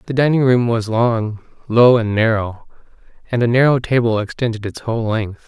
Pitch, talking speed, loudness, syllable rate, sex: 115 Hz, 175 wpm, -17 LUFS, 5.2 syllables/s, male